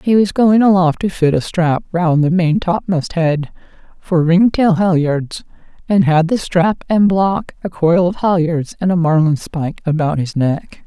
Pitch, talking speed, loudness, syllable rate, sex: 180 Hz, 190 wpm, -15 LUFS, 4.4 syllables/s, female